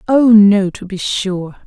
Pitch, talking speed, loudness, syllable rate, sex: 200 Hz, 180 wpm, -13 LUFS, 3.5 syllables/s, female